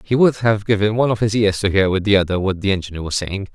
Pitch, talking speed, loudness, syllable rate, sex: 100 Hz, 305 wpm, -18 LUFS, 6.7 syllables/s, male